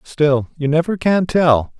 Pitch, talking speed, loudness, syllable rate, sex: 155 Hz, 170 wpm, -16 LUFS, 3.9 syllables/s, male